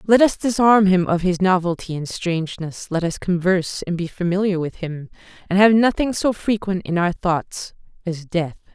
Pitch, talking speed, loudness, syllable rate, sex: 185 Hz, 185 wpm, -20 LUFS, 4.9 syllables/s, female